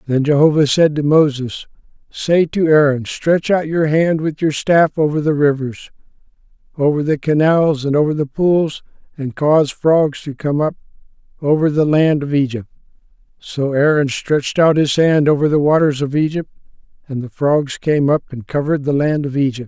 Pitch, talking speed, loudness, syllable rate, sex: 150 Hz, 175 wpm, -16 LUFS, 4.9 syllables/s, male